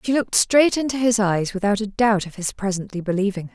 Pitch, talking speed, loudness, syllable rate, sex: 210 Hz, 235 wpm, -20 LUFS, 6.1 syllables/s, female